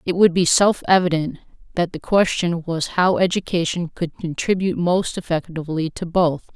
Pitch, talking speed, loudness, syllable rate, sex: 170 Hz, 155 wpm, -20 LUFS, 5.0 syllables/s, female